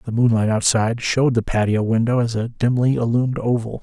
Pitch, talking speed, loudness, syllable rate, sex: 115 Hz, 190 wpm, -19 LUFS, 6.3 syllables/s, male